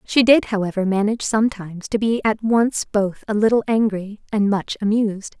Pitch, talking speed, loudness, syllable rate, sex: 210 Hz, 180 wpm, -19 LUFS, 5.4 syllables/s, female